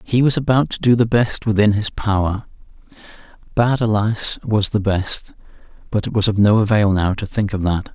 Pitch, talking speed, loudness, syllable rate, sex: 105 Hz, 195 wpm, -18 LUFS, 5.0 syllables/s, male